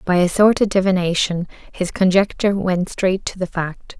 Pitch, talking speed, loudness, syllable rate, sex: 185 Hz, 180 wpm, -18 LUFS, 5.0 syllables/s, female